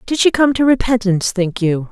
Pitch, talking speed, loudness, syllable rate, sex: 220 Hz, 220 wpm, -15 LUFS, 5.6 syllables/s, female